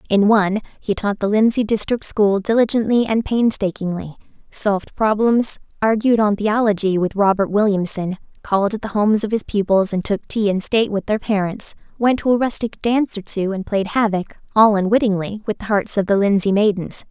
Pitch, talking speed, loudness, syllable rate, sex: 210 Hz, 185 wpm, -18 LUFS, 5.4 syllables/s, female